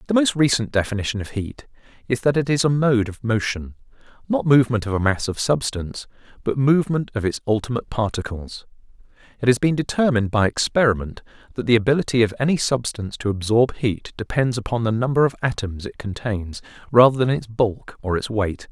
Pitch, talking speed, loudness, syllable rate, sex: 120 Hz, 185 wpm, -21 LUFS, 5.9 syllables/s, male